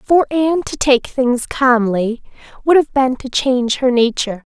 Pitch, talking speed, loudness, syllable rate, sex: 260 Hz, 170 wpm, -16 LUFS, 4.6 syllables/s, female